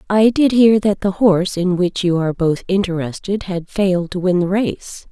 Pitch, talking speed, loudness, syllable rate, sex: 190 Hz, 210 wpm, -17 LUFS, 4.9 syllables/s, female